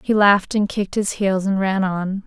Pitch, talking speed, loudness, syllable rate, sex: 195 Hz, 240 wpm, -19 LUFS, 5.1 syllables/s, female